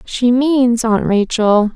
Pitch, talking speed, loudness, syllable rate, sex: 235 Hz, 135 wpm, -14 LUFS, 3.0 syllables/s, female